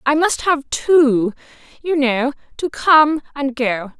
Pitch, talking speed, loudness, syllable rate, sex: 275 Hz, 135 wpm, -17 LUFS, 3.4 syllables/s, female